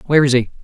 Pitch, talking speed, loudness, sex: 135 Hz, 285 wpm, -15 LUFS, male